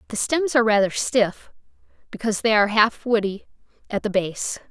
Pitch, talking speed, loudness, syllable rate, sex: 220 Hz, 165 wpm, -21 LUFS, 5.6 syllables/s, female